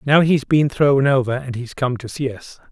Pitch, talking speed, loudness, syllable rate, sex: 135 Hz, 245 wpm, -18 LUFS, 4.8 syllables/s, male